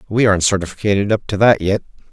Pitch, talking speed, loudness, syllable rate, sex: 100 Hz, 200 wpm, -16 LUFS, 7.1 syllables/s, male